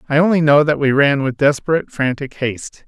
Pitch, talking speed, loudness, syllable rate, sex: 145 Hz, 210 wpm, -16 LUFS, 6.0 syllables/s, male